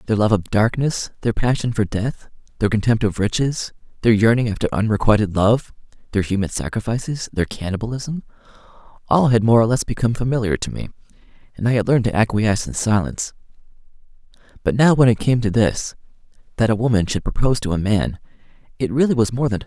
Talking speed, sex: 185 wpm, male